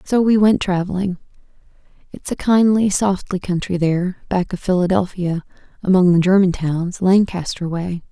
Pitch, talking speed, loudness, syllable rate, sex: 185 Hz, 140 wpm, -18 LUFS, 4.9 syllables/s, female